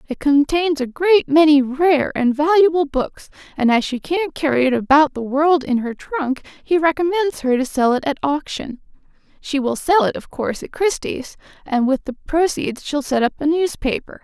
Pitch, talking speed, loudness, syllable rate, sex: 295 Hz, 195 wpm, -18 LUFS, 4.7 syllables/s, female